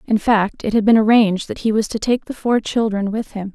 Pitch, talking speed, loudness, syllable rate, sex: 215 Hz, 270 wpm, -18 LUFS, 5.5 syllables/s, female